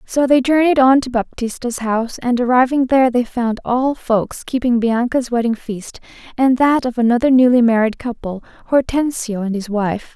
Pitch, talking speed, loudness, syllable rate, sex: 245 Hz, 170 wpm, -16 LUFS, 4.9 syllables/s, female